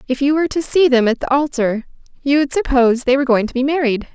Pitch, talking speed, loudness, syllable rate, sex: 270 Hz, 260 wpm, -16 LUFS, 6.7 syllables/s, female